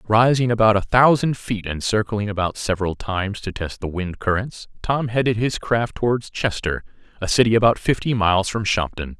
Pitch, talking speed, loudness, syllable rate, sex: 105 Hz, 185 wpm, -20 LUFS, 5.3 syllables/s, male